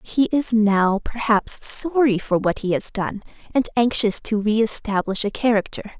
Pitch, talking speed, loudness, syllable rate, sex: 220 Hz, 160 wpm, -20 LUFS, 4.4 syllables/s, female